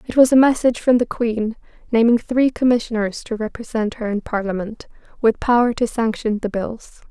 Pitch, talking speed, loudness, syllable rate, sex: 230 Hz, 175 wpm, -19 LUFS, 5.3 syllables/s, female